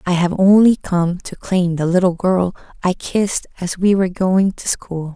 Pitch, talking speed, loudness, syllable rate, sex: 185 Hz, 200 wpm, -17 LUFS, 4.6 syllables/s, female